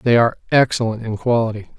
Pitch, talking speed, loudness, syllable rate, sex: 115 Hz, 170 wpm, -18 LUFS, 6.7 syllables/s, male